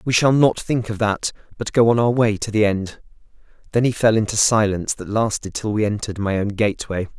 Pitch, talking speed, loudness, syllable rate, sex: 110 Hz, 235 wpm, -19 LUFS, 6.0 syllables/s, male